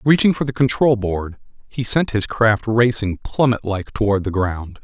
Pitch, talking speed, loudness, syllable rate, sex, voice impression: 115 Hz, 185 wpm, -19 LUFS, 4.5 syllables/s, male, masculine, middle-aged, tensed, slightly powerful, soft, cool, calm, slightly mature, friendly, wild, lively, slightly kind, modest